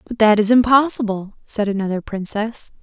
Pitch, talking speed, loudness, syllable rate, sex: 215 Hz, 150 wpm, -18 LUFS, 5.1 syllables/s, female